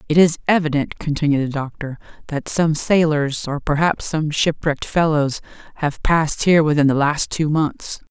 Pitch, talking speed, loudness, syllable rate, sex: 150 Hz, 165 wpm, -19 LUFS, 4.9 syllables/s, female